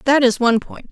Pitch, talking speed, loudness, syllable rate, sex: 250 Hz, 260 wpm, -16 LUFS, 6.3 syllables/s, female